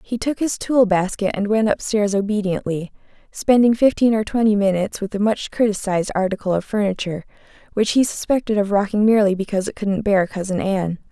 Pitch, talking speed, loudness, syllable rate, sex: 205 Hz, 180 wpm, -19 LUFS, 5.9 syllables/s, female